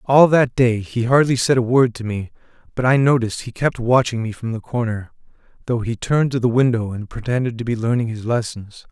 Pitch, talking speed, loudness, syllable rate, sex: 120 Hz, 220 wpm, -19 LUFS, 5.7 syllables/s, male